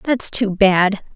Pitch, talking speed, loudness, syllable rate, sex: 205 Hz, 155 wpm, -16 LUFS, 3.2 syllables/s, female